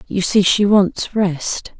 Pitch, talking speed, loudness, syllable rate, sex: 195 Hz, 165 wpm, -16 LUFS, 3.2 syllables/s, female